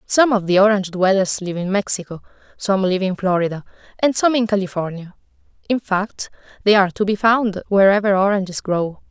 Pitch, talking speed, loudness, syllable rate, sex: 195 Hz, 170 wpm, -18 LUFS, 5.6 syllables/s, female